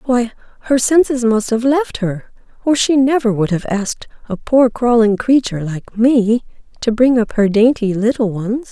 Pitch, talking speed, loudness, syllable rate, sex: 235 Hz, 180 wpm, -15 LUFS, 4.7 syllables/s, female